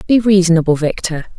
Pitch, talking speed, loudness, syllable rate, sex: 180 Hz, 130 wpm, -14 LUFS, 6.4 syllables/s, female